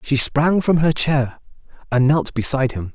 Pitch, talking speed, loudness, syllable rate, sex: 140 Hz, 185 wpm, -18 LUFS, 4.6 syllables/s, male